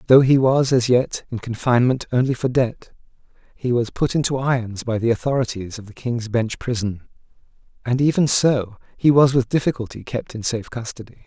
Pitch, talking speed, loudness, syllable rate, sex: 125 Hz, 180 wpm, -20 LUFS, 5.4 syllables/s, male